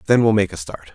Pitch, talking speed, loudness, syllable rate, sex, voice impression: 95 Hz, 315 wpm, -18 LUFS, 6.5 syllables/s, male, very masculine, very adult-like, slightly old, very thick, tensed, very powerful, bright, soft, clear, very fluent, slightly raspy, very cool, very intellectual, very sincere, very calm, very mature, very friendly, very reassuring, unique, elegant, very wild, very sweet, lively, kind